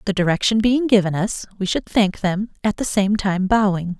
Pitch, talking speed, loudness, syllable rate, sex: 200 Hz, 210 wpm, -19 LUFS, 5.0 syllables/s, female